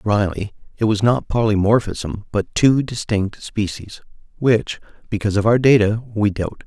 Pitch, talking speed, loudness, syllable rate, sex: 105 Hz, 135 wpm, -19 LUFS, 4.6 syllables/s, male